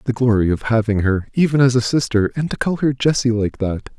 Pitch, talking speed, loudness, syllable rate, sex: 120 Hz, 240 wpm, -18 LUFS, 5.6 syllables/s, male